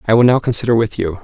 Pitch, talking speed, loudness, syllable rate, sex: 110 Hz, 290 wpm, -14 LUFS, 7.2 syllables/s, male